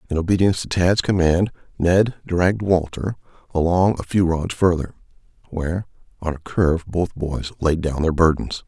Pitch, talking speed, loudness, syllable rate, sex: 85 Hz, 160 wpm, -20 LUFS, 5.1 syllables/s, male